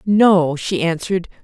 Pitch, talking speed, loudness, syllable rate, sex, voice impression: 180 Hz, 125 wpm, -17 LUFS, 4.1 syllables/s, female, very feminine, slightly young, very adult-like, thin, very tensed, powerful, bright, hard, clear, fluent, slightly raspy, cool, very intellectual, very refreshing, sincere, very calm, friendly, reassuring, unique, elegant, slightly wild, slightly lively, slightly strict, slightly intense, sharp